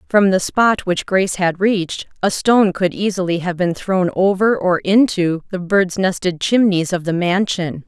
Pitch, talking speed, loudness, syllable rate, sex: 185 Hz, 175 wpm, -17 LUFS, 4.6 syllables/s, female